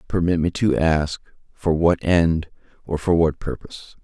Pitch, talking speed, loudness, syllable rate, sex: 80 Hz, 165 wpm, -21 LUFS, 4.4 syllables/s, male